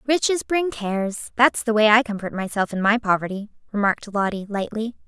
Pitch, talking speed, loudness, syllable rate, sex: 220 Hz, 175 wpm, -21 LUFS, 5.6 syllables/s, female